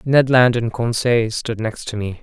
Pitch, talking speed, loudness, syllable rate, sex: 115 Hz, 215 wpm, -18 LUFS, 4.2 syllables/s, male